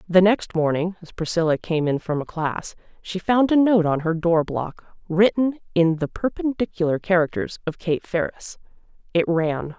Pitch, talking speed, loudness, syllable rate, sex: 175 Hz, 170 wpm, -22 LUFS, 4.7 syllables/s, female